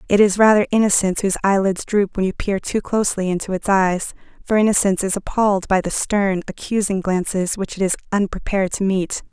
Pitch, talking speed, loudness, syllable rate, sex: 195 Hz, 195 wpm, -19 LUFS, 6.0 syllables/s, female